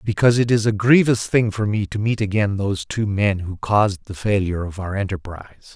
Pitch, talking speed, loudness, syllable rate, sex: 100 Hz, 220 wpm, -20 LUFS, 5.7 syllables/s, male